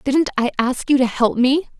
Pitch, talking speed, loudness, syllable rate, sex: 260 Hz, 235 wpm, -18 LUFS, 5.0 syllables/s, female